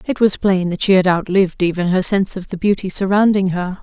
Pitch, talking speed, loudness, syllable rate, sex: 190 Hz, 235 wpm, -16 LUFS, 6.0 syllables/s, female